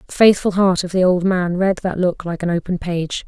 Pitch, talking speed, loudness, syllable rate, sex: 180 Hz, 255 wpm, -18 LUFS, 5.2 syllables/s, female